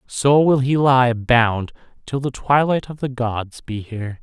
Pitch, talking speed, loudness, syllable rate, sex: 125 Hz, 185 wpm, -18 LUFS, 4.0 syllables/s, male